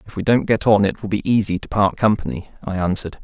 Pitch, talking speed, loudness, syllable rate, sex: 100 Hz, 260 wpm, -19 LUFS, 6.5 syllables/s, male